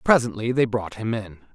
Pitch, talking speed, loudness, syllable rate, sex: 110 Hz, 195 wpm, -24 LUFS, 5.5 syllables/s, male